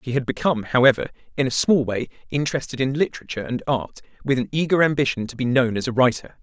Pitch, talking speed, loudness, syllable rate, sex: 130 Hz, 215 wpm, -21 LUFS, 7.0 syllables/s, male